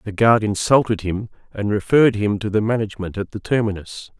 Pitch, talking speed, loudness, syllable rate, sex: 105 Hz, 185 wpm, -19 LUFS, 5.8 syllables/s, male